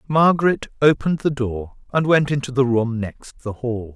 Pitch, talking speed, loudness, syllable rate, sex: 130 Hz, 180 wpm, -20 LUFS, 4.8 syllables/s, male